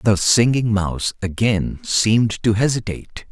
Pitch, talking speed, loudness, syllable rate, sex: 110 Hz, 125 wpm, -18 LUFS, 4.6 syllables/s, male